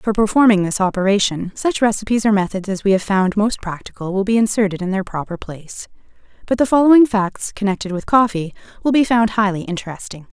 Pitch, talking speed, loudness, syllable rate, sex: 205 Hz, 190 wpm, -17 LUFS, 6.0 syllables/s, female